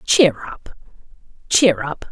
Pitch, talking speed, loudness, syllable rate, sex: 200 Hz, 115 wpm, -16 LUFS, 3.3 syllables/s, female